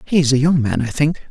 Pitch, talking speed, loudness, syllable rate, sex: 145 Hz, 320 wpm, -17 LUFS, 6.1 syllables/s, male